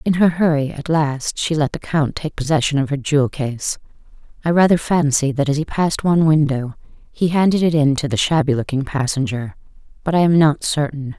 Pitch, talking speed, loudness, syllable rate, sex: 150 Hz, 205 wpm, -18 LUFS, 5.4 syllables/s, female